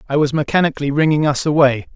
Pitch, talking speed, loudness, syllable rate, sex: 145 Hz, 185 wpm, -16 LUFS, 6.9 syllables/s, male